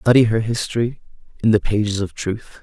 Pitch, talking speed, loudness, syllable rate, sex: 110 Hz, 185 wpm, -20 LUFS, 5.5 syllables/s, male